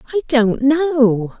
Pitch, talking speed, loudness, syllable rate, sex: 265 Hz, 130 wpm, -15 LUFS, 3.0 syllables/s, female